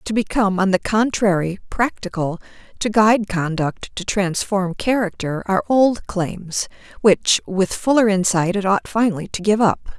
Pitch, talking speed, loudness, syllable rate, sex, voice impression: 200 Hz, 150 wpm, -19 LUFS, 4.6 syllables/s, female, feminine, slightly adult-like, bright, muffled, raspy, slightly intellectual, slightly calm, friendly, slightly elegant, slightly sharp, slightly modest